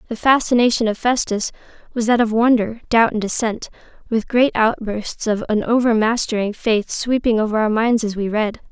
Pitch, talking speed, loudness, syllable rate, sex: 225 Hz, 170 wpm, -18 LUFS, 5.1 syllables/s, female